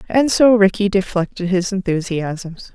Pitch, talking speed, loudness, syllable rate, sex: 195 Hz, 130 wpm, -17 LUFS, 4.3 syllables/s, female